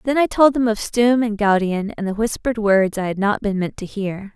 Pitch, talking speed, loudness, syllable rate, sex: 215 Hz, 260 wpm, -19 LUFS, 5.2 syllables/s, female